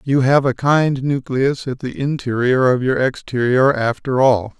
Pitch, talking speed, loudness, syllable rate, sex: 130 Hz, 170 wpm, -17 LUFS, 4.3 syllables/s, male